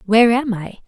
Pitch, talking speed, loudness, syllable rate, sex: 225 Hz, 205 wpm, -17 LUFS, 6.1 syllables/s, female